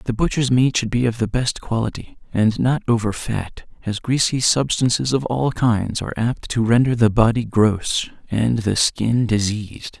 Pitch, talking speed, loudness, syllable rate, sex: 115 Hz, 180 wpm, -19 LUFS, 4.5 syllables/s, male